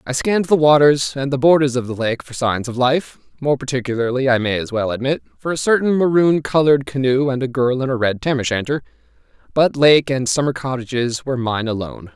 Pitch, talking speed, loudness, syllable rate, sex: 130 Hz, 205 wpm, -18 LUFS, 6.0 syllables/s, male